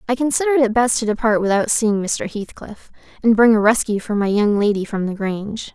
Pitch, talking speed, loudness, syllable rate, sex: 220 Hz, 220 wpm, -18 LUFS, 5.7 syllables/s, female